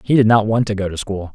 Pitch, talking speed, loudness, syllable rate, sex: 105 Hz, 355 wpm, -17 LUFS, 6.5 syllables/s, male